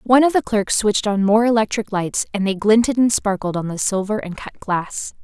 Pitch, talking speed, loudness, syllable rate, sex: 210 Hz, 230 wpm, -18 LUFS, 5.4 syllables/s, female